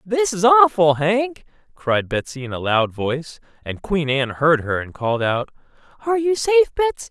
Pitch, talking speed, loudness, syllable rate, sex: 155 Hz, 185 wpm, -19 LUFS, 5.1 syllables/s, male